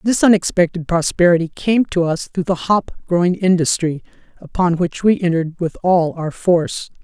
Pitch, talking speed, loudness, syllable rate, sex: 175 Hz, 160 wpm, -17 LUFS, 5.1 syllables/s, female